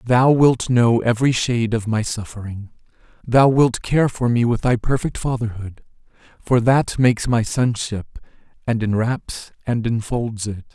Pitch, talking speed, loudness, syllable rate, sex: 115 Hz, 150 wpm, -19 LUFS, 4.4 syllables/s, male